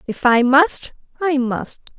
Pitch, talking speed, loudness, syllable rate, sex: 275 Hz, 150 wpm, -17 LUFS, 3.6 syllables/s, female